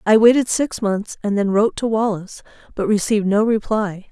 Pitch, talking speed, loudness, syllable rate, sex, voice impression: 210 Hz, 190 wpm, -18 LUFS, 5.6 syllables/s, female, feminine, adult-like, tensed, bright, clear, fluent, intellectual, calm, friendly, reassuring, elegant, lively, kind